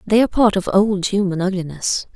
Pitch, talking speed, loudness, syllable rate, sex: 195 Hz, 195 wpm, -18 LUFS, 5.9 syllables/s, female